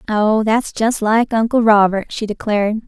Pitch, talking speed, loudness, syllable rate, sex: 220 Hz, 165 wpm, -16 LUFS, 4.5 syllables/s, female